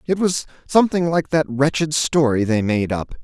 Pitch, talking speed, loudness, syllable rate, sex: 145 Hz, 185 wpm, -19 LUFS, 4.9 syllables/s, male